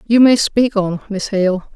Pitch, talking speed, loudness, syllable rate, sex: 205 Hz, 205 wpm, -15 LUFS, 3.9 syllables/s, female